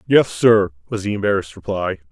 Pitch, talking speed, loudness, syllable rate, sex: 100 Hz, 170 wpm, -18 LUFS, 6.1 syllables/s, male